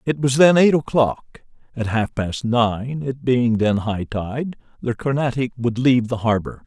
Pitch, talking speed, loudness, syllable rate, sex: 125 Hz, 180 wpm, -20 LUFS, 4.2 syllables/s, male